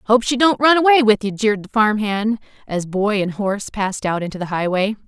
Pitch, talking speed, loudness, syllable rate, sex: 215 Hz, 235 wpm, -18 LUFS, 5.6 syllables/s, female